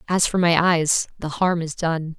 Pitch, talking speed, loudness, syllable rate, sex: 165 Hz, 220 wpm, -20 LUFS, 4.2 syllables/s, female